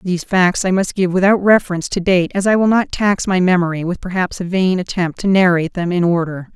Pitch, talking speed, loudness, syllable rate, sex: 185 Hz, 240 wpm, -16 LUFS, 5.9 syllables/s, female